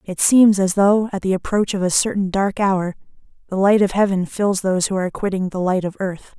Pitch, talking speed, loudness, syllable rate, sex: 195 Hz, 235 wpm, -18 LUFS, 5.5 syllables/s, female